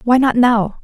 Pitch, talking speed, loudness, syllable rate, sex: 235 Hz, 215 wpm, -14 LUFS, 4.5 syllables/s, female